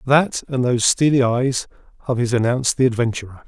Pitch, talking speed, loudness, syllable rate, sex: 125 Hz, 175 wpm, -19 LUFS, 6.0 syllables/s, male